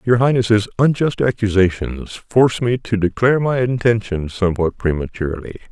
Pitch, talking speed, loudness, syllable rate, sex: 110 Hz, 125 wpm, -18 LUFS, 5.2 syllables/s, male